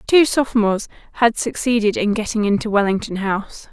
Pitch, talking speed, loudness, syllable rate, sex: 220 Hz, 145 wpm, -18 LUFS, 5.9 syllables/s, female